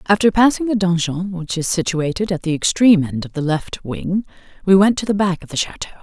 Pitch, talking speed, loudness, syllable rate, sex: 185 Hz, 230 wpm, -18 LUFS, 5.6 syllables/s, female